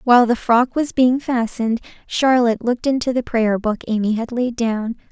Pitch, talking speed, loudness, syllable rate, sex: 235 Hz, 190 wpm, -18 LUFS, 5.3 syllables/s, female